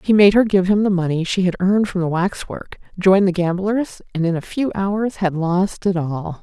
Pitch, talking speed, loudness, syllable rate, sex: 190 Hz, 235 wpm, -18 LUFS, 5.0 syllables/s, female